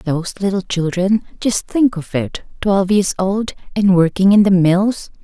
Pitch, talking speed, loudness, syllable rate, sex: 190 Hz, 150 wpm, -16 LUFS, 4.5 syllables/s, female